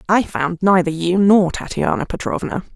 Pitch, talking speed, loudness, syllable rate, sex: 180 Hz, 155 wpm, -17 LUFS, 4.9 syllables/s, female